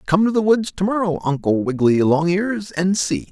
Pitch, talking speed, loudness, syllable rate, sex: 180 Hz, 200 wpm, -19 LUFS, 5.1 syllables/s, male